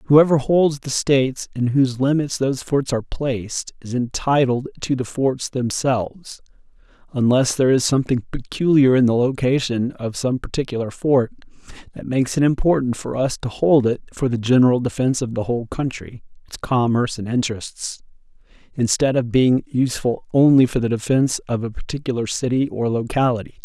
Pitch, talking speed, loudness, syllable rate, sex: 130 Hz, 160 wpm, -20 LUFS, 5.4 syllables/s, male